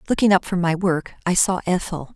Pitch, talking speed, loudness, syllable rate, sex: 180 Hz, 225 wpm, -20 LUFS, 5.7 syllables/s, female